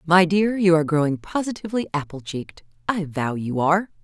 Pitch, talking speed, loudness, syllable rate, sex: 170 Hz, 165 wpm, -22 LUFS, 5.9 syllables/s, female